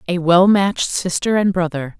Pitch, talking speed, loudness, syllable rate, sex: 180 Hz, 180 wpm, -16 LUFS, 5.0 syllables/s, female